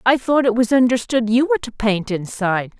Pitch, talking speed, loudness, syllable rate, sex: 235 Hz, 215 wpm, -18 LUFS, 5.6 syllables/s, female